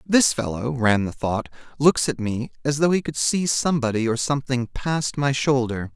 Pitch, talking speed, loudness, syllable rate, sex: 130 Hz, 170 wpm, -22 LUFS, 4.8 syllables/s, male